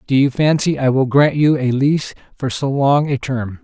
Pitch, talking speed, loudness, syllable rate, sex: 135 Hz, 230 wpm, -16 LUFS, 4.9 syllables/s, male